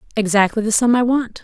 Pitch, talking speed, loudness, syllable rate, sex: 225 Hz, 210 wpm, -16 LUFS, 6.3 syllables/s, female